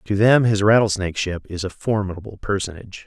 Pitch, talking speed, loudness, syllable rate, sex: 100 Hz, 175 wpm, -20 LUFS, 6.2 syllables/s, male